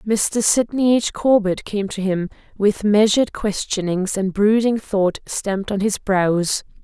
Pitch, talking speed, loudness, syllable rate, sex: 205 Hz, 150 wpm, -19 LUFS, 4.0 syllables/s, female